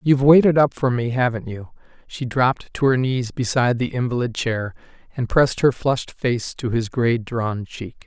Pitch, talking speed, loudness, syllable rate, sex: 125 Hz, 195 wpm, -20 LUFS, 5.0 syllables/s, male